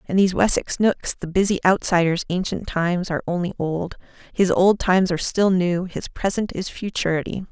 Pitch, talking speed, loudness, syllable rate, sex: 180 Hz, 175 wpm, -21 LUFS, 5.5 syllables/s, female